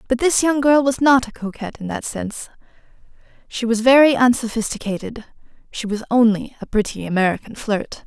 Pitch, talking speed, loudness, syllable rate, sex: 235 Hz, 165 wpm, -18 LUFS, 5.6 syllables/s, female